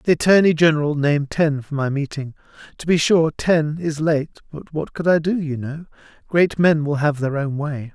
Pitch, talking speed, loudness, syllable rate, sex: 155 Hz, 210 wpm, -19 LUFS, 5.1 syllables/s, male